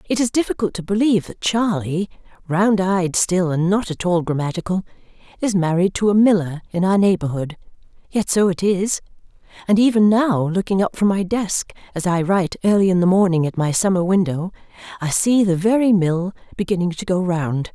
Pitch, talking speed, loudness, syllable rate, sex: 190 Hz, 185 wpm, -19 LUFS, 4.8 syllables/s, female